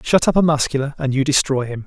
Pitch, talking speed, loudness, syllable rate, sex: 140 Hz, 255 wpm, -18 LUFS, 6.3 syllables/s, male